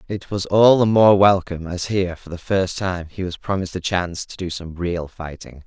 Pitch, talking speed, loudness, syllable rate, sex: 90 Hz, 235 wpm, -20 LUFS, 5.3 syllables/s, male